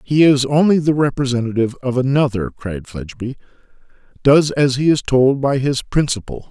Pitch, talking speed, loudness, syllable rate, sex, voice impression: 130 Hz, 155 wpm, -16 LUFS, 5.4 syllables/s, male, masculine, middle-aged, thick, tensed, slightly powerful, hard, intellectual, sincere, calm, mature, reassuring, wild, slightly lively, slightly kind